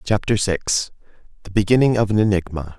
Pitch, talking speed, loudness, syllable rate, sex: 100 Hz, 130 wpm, -19 LUFS, 5.6 syllables/s, male